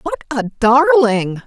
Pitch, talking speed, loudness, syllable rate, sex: 255 Hz, 125 wpm, -14 LUFS, 3.7 syllables/s, female